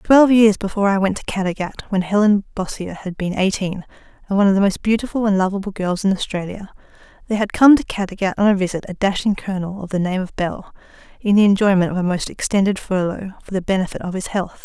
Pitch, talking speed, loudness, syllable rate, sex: 195 Hz, 220 wpm, -19 LUFS, 6.4 syllables/s, female